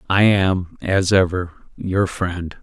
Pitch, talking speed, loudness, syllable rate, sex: 95 Hz, 135 wpm, -19 LUFS, 3.4 syllables/s, male